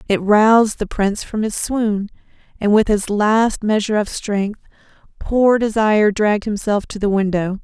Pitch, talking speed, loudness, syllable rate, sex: 210 Hz, 165 wpm, -17 LUFS, 4.7 syllables/s, female